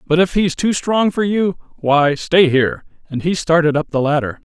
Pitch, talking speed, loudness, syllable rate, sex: 165 Hz, 215 wpm, -16 LUFS, 4.9 syllables/s, male